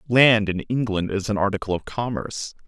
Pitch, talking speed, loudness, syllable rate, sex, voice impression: 105 Hz, 180 wpm, -22 LUFS, 5.4 syllables/s, male, masculine, adult-like, thick, tensed, powerful, clear, cool, intellectual, sincere, calm, slightly mature, friendly, wild, lively